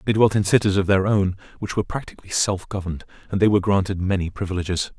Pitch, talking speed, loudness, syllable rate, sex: 95 Hz, 215 wpm, -22 LUFS, 7.1 syllables/s, male